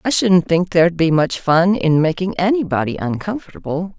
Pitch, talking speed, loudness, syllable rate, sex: 175 Hz, 165 wpm, -17 LUFS, 5.2 syllables/s, female